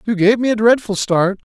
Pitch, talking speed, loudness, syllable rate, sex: 215 Hz, 240 wpm, -15 LUFS, 5.3 syllables/s, male